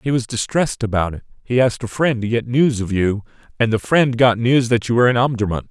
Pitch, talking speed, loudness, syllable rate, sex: 120 Hz, 250 wpm, -18 LUFS, 6.1 syllables/s, male